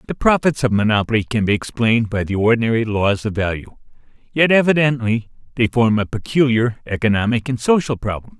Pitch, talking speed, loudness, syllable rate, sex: 115 Hz, 165 wpm, -18 LUFS, 5.9 syllables/s, male